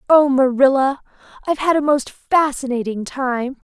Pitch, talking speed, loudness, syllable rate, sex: 270 Hz, 130 wpm, -18 LUFS, 4.6 syllables/s, female